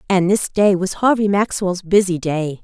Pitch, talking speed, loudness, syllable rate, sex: 190 Hz, 180 wpm, -17 LUFS, 4.5 syllables/s, female